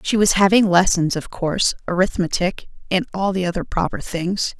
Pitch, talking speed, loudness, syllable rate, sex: 185 Hz, 170 wpm, -19 LUFS, 5.2 syllables/s, female